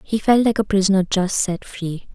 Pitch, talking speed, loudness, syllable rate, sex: 195 Hz, 225 wpm, -19 LUFS, 5.0 syllables/s, female